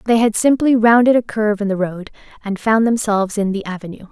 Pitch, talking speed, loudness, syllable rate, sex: 215 Hz, 220 wpm, -16 LUFS, 6.1 syllables/s, female